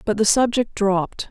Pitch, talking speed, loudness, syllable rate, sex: 210 Hz, 185 wpm, -19 LUFS, 5.0 syllables/s, female